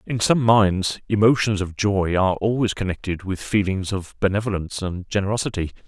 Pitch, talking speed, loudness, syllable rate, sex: 100 Hz, 155 wpm, -21 LUFS, 5.5 syllables/s, male